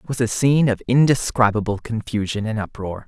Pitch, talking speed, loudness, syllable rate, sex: 115 Hz, 175 wpm, -20 LUFS, 5.7 syllables/s, male